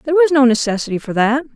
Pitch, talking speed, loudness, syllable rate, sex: 255 Hz, 230 wpm, -15 LUFS, 7.0 syllables/s, female